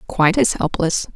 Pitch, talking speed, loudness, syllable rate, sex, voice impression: 180 Hz, 155 wpm, -18 LUFS, 5.3 syllables/s, female, feminine, slightly gender-neutral, very adult-like, slightly old, slightly thin, relaxed, weak, slightly dark, very soft, very muffled, slightly halting, very raspy, slightly cool, intellectual, very sincere, very calm, mature, slightly friendly, slightly reassuring, very unique, very elegant, sweet, very kind, very modest